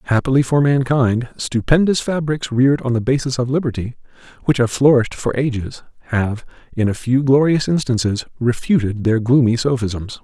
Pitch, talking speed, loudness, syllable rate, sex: 125 Hz, 150 wpm, -17 LUFS, 5.3 syllables/s, male